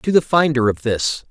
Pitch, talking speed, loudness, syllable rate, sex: 135 Hz, 230 wpm, -17 LUFS, 4.9 syllables/s, male